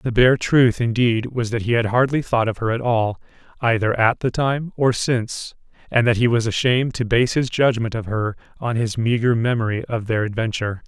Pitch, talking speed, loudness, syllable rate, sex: 115 Hz, 210 wpm, -20 LUFS, 5.3 syllables/s, male